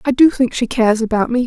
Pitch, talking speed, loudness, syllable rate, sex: 240 Hz, 285 wpm, -15 LUFS, 6.3 syllables/s, female